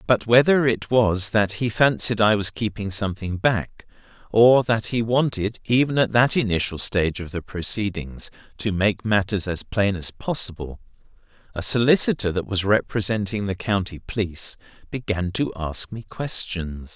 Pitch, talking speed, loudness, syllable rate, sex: 105 Hz, 155 wpm, -22 LUFS, 4.7 syllables/s, male